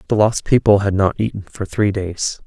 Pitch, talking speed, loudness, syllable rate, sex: 100 Hz, 220 wpm, -18 LUFS, 5.0 syllables/s, male